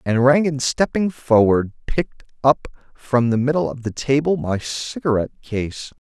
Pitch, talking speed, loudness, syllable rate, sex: 130 Hz, 140 wpm, -20 LUFS, 4.6 syllables/s, male